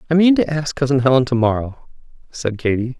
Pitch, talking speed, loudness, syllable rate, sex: 130 Hz, 200 wpm, -17 LUFS, 5.9 syllables/s, male